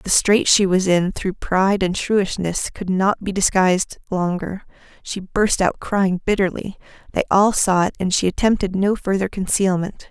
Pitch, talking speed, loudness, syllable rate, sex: 190 Hz, 170 wpm, -19 LUFS, 4.6 syllables/s, female